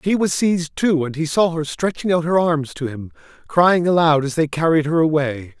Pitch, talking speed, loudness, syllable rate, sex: 160 Hz, 225 wpm, -18 LUFS, 5.1 syllables/s, male